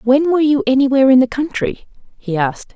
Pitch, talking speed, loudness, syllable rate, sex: 265 Hz, 195 wpm, -15 LUFS, 6.3 syllables/s, female